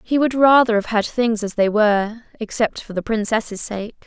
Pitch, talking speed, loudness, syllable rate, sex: 220 Hz, 205 wpm, -19 LUFS, 4.7 syllables/s, female